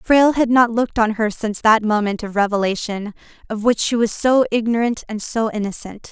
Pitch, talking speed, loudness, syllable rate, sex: 225 Hz, 195 wpm, -18 LUFS, 5.6 syllables/s, female